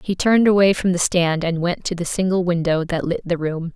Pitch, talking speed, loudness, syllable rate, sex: 175 Hz, 255 wpm, -19 LUFS, 5.7 syllables/s, female